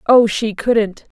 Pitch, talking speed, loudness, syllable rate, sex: 220 Hz, 150 wpm, -16 LUFS, 3.3 syllables/s, female